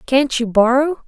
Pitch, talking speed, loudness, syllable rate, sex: 260 Hz, 170 wpm, -16 LUFS, 4.6 syllables/s, female